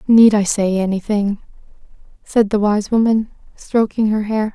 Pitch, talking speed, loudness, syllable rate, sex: 210 Hz, 160 wpm, -16 LUFS, 4.5 syllables/s, female